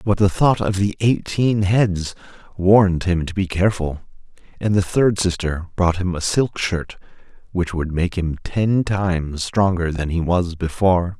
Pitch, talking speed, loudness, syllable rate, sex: 90 Hz, 170 wpm, -19 LUFS, 4.4 syllables/s, male